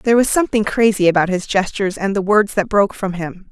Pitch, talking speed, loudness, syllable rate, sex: 200 Hz, 240 wpm, -17 LUFS, 6.3 syllables/s, female